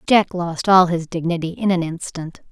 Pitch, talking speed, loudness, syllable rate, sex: 175 Hz, 190 wpm, -19 LUFS, 4.8 syllables/s, female